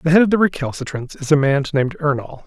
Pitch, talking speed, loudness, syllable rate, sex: 150 Hz, 245 wpm, -18 LUFS, 6.5 syllables/s, male